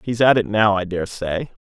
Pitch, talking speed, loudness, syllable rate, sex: 105 Hz, 220 wpm, -19 LUFS, 5.5 syllables/s, male